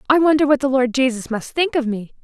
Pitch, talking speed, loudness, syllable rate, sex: 260 Hz, 270 wpm, -18 LUFS, 6.1 syllables/s, female